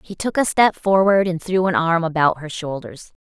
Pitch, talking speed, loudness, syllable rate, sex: 175 Hz, 225 wpm, -18 LUFS, 4.9 syllables/s, female